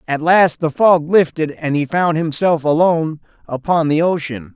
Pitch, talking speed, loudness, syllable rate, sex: 160 Hz, 170 wpm, -16 LUFS, 4.6 syllables/s, male